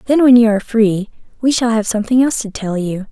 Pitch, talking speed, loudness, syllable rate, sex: 225 Hz, 250 wpm, -14 LUFS, 6.5 syllables/s, female